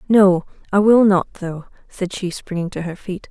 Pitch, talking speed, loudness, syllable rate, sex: 185 Hz, 200 wpm, -18 LUFS, 4.5 syllables/s, female